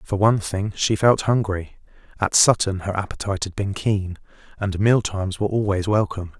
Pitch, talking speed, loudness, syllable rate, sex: 100 Hz, 180 wpm, -21 LUFS, 5.5 syllables/s, male